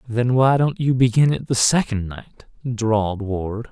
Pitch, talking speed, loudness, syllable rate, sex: 120 Hz, 180 wpm, -19 LUFS, 4.1 syllables/s, male